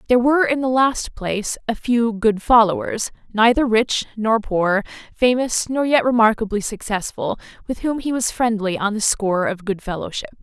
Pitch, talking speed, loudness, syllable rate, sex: 225 Hz, 175 wpm, -19 LUFS, 5.0 syllables/s, female